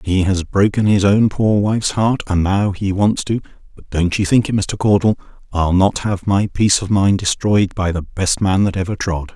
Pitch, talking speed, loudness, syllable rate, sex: 100 Hz, 220 wpm, -17 LUFS, 4.9 syllables/s, male